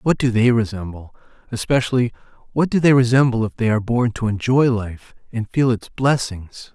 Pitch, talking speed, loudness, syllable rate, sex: 120 Hz, 180 wpm, -19 LUFS, 5.2 syllables/s, male